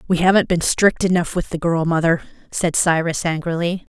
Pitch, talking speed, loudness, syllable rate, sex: 170 Hz, 180 wpm, -18 LUFS, 5.2 syllables/s, female